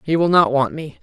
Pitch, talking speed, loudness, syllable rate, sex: 155 Hz, 295 wpm, -17 LUFS, 5.4 syllables/s, female